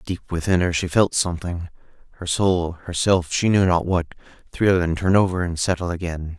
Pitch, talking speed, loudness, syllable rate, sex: 90 Hz, 170 wpm, -21 LUFS, 5.1 syllables/s, male